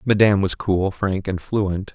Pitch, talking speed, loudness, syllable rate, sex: 95 Hz, 185 wpm, -21 LUFS, 4.3 syllables/s, male